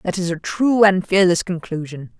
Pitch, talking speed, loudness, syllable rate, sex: 185 Hz, 190 wpm, -18 LUFS, 4.7 syllables/s, female